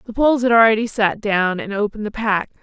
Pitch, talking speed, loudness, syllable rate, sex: 215 Hz, 230 wpm, -18 LUFS, 6.3 syllables/s, female